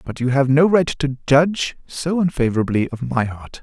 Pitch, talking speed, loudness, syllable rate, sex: 140 Hz, 200 wpm, -19 LUFS, 5.1 syllables/s, male